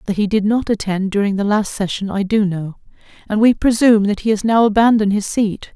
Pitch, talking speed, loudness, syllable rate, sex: 210 Hz, 230 wpm, -16 LUFS, 5.9 syllables/s, female